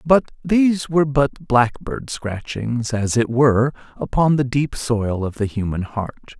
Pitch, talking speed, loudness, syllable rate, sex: 130 Hz, 160 wpm, -20 LUFS, 4.3 syllables/s, male